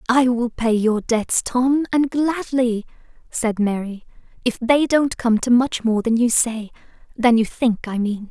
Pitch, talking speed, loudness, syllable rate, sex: 240 Hz, 175 wpm, -19 LUFS, 4.0 syllables/s, female